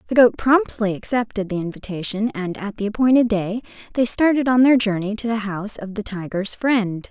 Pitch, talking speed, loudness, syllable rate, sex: 215 Hz, 195 wpm, -20 LUFS, 5.4 syllables/s, female